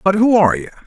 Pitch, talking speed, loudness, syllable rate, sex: 185 Hz, 280 wpm, -14 LUFS, 8.3 syllables/s, male